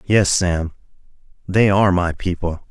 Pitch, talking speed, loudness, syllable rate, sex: 90 Hz, 135 wpm, -18 LUFS, 4.3 syllables/s, male